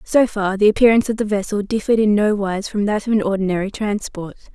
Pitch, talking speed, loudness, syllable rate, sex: 205 Hz, 225 wpm, -18 LUFS, 6.3 syllables/s, female